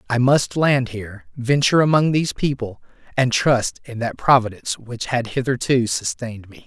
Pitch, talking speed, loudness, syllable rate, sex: 120 Hz, 160 wpm, -20 LUFS, 5.1 syllables/s, male